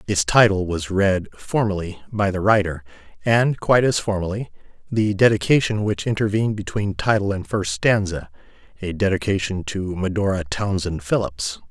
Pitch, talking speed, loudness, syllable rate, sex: 100 Hz, 135 wpm, -21 LUFS, 5.0 syllables/s, male